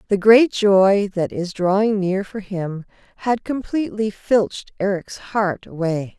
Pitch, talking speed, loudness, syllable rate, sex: 195 Hz, 145 wpm, -19 LUFS, 4.0 syllables/s, female